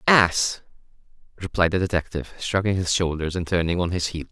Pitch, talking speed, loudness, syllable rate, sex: 90 Hz, 165 wpm, -23 LUFS, 5.8 syllables/s, male